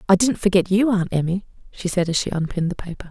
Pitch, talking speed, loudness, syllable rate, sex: 185 Hz, 250 wpm, -21 LUFS, 6.7 syllables/s, female